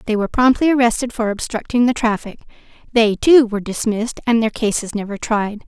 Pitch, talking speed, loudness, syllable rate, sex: 225 Hz, 180 wpm, -17 LUFS, 5.9 syllables/s, female